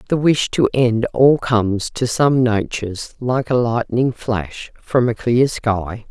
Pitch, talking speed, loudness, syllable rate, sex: 120 Hz, 165 wpm, -18 LUFS, 3.7 syllables/s, female